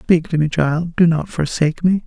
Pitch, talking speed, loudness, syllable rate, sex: 165 Hz, 205 wpm, -17 LUFS, 4.9 syllables/s, male